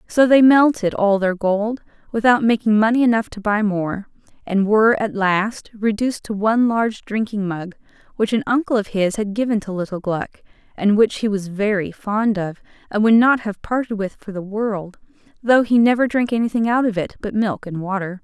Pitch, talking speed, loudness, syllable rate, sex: 215 Hz, 200 wpm, -19 LUFS, 5.2 syllables/s, female